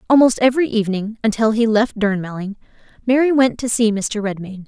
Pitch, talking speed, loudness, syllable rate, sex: 220 Hz, 165 wpm, -17 LUFS, 5.8 syllables/s, female